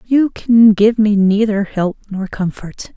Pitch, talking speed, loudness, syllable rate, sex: 210 Hz, 160 wpm, -14 LUFS, 3.7 syllables/s, female